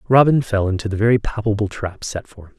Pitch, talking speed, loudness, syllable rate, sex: 110 Hz, 230 wpm, -19 LUFS, 6.1 syllables/s, male